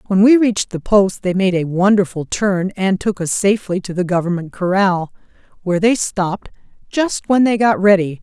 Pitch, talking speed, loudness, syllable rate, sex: 190 Hz, 190 wpm, -16 LUFS, 5.2 syllables/s, female